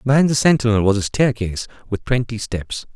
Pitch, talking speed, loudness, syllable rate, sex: 115 Hz, 185 wpm, -19 LUFS, 5.9 syllables/s, male